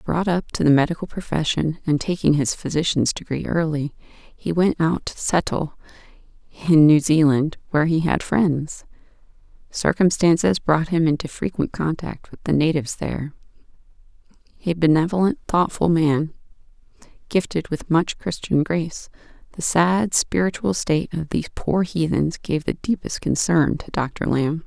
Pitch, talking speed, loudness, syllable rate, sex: 160 Hz, 140 wpm, -21 LUFS, 4.7 syllables/s, female